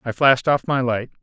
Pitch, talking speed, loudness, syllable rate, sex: 130 Hz, 245 wpm, -19 LUFS, 5.8 syllables/s, male